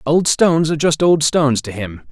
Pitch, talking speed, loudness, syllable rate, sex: 145 Hz, 225 wpm, -15 LUFS, 5.6 syllables/s, male